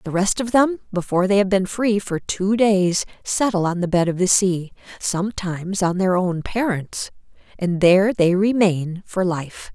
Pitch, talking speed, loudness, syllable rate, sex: 190 Hz, 180 wpm, -20 LUFS, 4.6 syllables/s, female